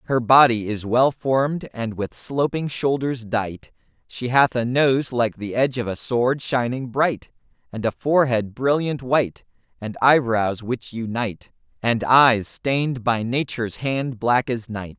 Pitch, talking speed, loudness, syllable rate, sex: 120 Hz, 160 wpm, -21 LUFS, 4.2 syllables/s, male